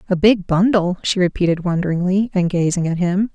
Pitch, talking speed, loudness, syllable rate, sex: 185 Hz, 180 wpm, -18 LUFS, 5.6 syllables/s, female